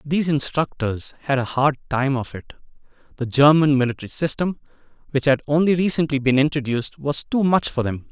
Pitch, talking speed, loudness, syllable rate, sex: 140 Hz, 170 wpm, -20 LUFS, 5.7 syllables/s, male